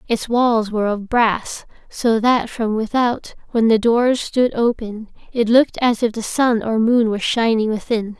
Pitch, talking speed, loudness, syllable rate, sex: 225 Hz, 185 wpm, -18 LUFS, 4.4 syllables/s, female